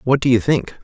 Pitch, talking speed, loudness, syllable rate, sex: 125 Hz, 285 wpm, -17 LUFS, 5.5 syllables/s, male